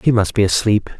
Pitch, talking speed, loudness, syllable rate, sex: 105 Hz, 240 wpm, -16 LUFS, 5.3 syllables/s, male